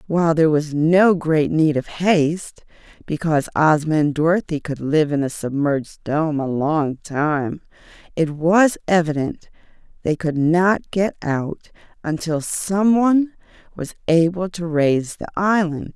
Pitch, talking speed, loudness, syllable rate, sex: 160 Hz, 140 wpm, -19 LUFS, 4.2 syllables/s, female